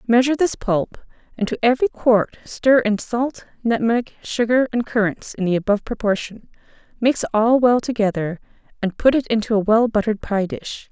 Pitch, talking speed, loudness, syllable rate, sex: 225 Hz, 170 wpm, -19 LUFS, 5.2 syllables/s, female